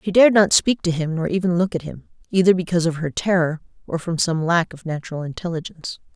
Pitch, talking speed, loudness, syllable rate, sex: 175 Hz, 225 wpm, -20 LUFS, 6.4 syllables/s, female